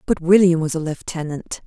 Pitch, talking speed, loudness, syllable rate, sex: 165 Hz, 180 wpm, -19 LUFS, 5.3 syllables/s, female